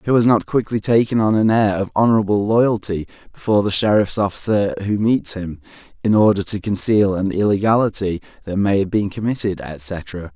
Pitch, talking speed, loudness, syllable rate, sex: 100 Hz, 175 wpm, -18 LUFS, 5.3 syllables/s, male